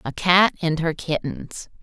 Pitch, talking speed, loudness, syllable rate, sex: 165 Hz, 165 wpm, -20 LUFS, 3.8 syllables/s, female